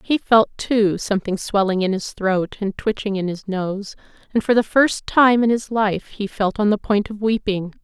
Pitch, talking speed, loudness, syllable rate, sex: 205 Hz, 215 wpm, -20 LUFS, 4.6 syllables/s, female